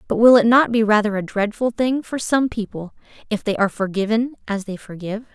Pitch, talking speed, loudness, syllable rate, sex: 220 Hz, 215 wpm, -19 LUFS, 5.8 syllables/s, female